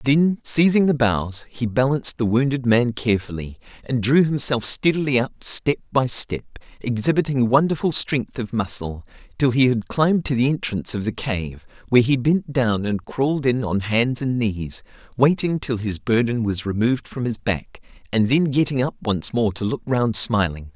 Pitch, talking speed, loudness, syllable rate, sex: 120 Hz, 180 wpm, -21 LUFS, 4.8 syllables/s, male